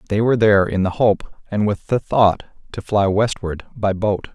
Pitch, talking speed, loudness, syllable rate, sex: 105 Hz, 205 wpm, -18 LUFS, 5.1 syllables/s, male